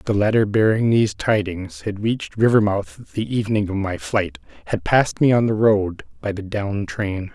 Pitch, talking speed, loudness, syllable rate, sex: 105 Hz, 180 wpm, -20 LUFS, 4.9 syllables/s, male